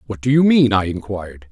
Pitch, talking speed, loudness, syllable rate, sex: 110 Hz, 235 wpm, -16 LUFS, 5.9 syllables/s, male